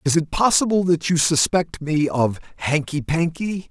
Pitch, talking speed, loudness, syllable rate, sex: 160 Hz, 160 wpm, -20 LUFS, 4.4 syllables/s, male